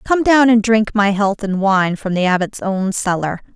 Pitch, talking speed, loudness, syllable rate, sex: 205 Hz, 220 wpm, -16 LUFS, 4.6 syllables/s, female